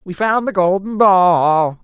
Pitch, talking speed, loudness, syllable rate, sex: 190 Hz, 165 wpm, -14 LUFS, 3.5 syllables/s, male